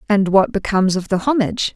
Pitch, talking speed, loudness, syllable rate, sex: 205 Hz, 205 wpm, -17 LUFS, 6.4 syllables/s, female